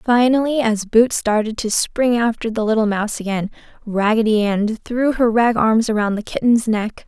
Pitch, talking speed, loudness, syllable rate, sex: 225 Hz, 180 wpm, -18 LUFS, 4.8 syllables/s, female